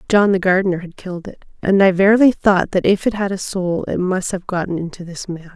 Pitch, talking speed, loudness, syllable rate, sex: 190 Hz, 250 wpm, -17 LUFS, 5.8 syllables/s, female